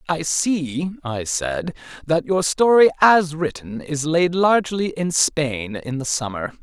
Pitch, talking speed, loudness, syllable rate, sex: 155 Hz, 155 wpm, -20 LUFS, 3.8 syllables/s, male